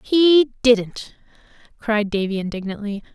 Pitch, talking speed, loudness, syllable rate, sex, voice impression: 225 Hz, 95 wpm, -19 LUFS, 4.0 syllables/s, female, feminine, adult-like, clear, refreshing, friendly, slightly lively